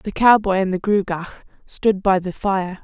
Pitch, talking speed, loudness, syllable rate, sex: 195 Hz, 190 wpm, -19 LUFS, 4.6 syllables/s, female